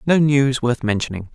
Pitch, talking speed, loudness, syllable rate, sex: 130 Hz, 180 wpm, -19 LUFS, 5.1 syllables/s, male